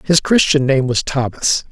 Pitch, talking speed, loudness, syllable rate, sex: 140 Hz, 175 wpm, -15 LUFS, 4.4 syllables/s, male